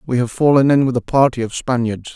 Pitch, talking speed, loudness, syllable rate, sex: 125 Hz, 250 wpm, -16 LUFS, 6.0 syllables/s, male